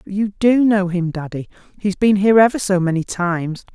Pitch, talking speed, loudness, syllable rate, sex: 190 Hz, 210 wpm, -17 LUFS, 5.5 syllables/s, female